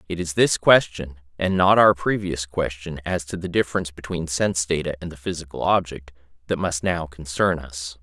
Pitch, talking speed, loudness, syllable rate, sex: 85 Hz, 185 wpm, -22 LUFS, 5.3 syllables/s, male